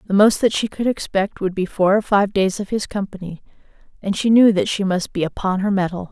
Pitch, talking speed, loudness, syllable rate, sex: 195 Hz, 245 wpm, -19 LUFS, 5.6 syllables/s, female